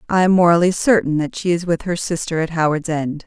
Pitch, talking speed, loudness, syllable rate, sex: 165 Hz, 240 wpm, -17 LUFS, 5.8 syllables/s, female